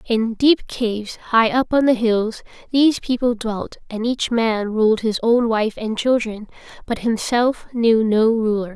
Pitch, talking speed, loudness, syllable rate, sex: 230 Hz, 170 wpm, -19 LUFS, 4.0 syllables/s, female